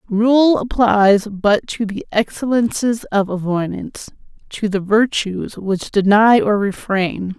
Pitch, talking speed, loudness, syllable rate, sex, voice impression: 210 Hz, 115 wpm, -16 LUFS, 3.7 syllables/s, female, feminine, very adult-like, slightly soft, calm, slightly unique, elegant